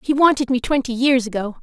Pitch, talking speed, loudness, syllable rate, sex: 255 Hz, 220 wpm, -18 LUFS, 6.1 syllables/s, female